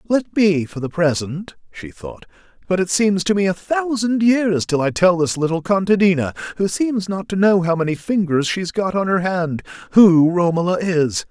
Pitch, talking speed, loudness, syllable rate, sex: 180 Hz, 195 wpm, -18 LUFS, 4.7 syllables/s, male